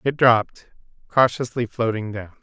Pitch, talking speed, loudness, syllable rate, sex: 115 Hz, 125 wpm, -21 LUFS, 4.9 syllables/s, male